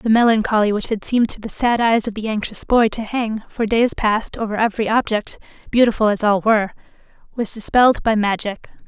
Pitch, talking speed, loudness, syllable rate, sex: 220 Hz, 195 wpm, -18 LUFS, 5.7 syllables/s, female